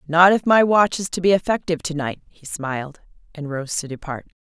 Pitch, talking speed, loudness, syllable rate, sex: 165 Hz, 215 wpm, -20 LUFS, 5.6 syllables/s, female